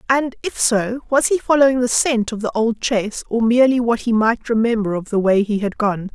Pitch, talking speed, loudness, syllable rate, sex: 230 Hz, 235 wpm, -18 LUFS, 5.4 syllables/s, female